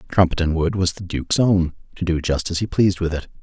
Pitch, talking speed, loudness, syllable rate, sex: 85 Hz, 230 wpm, -20 LUFS, 6.2 syllables/s, male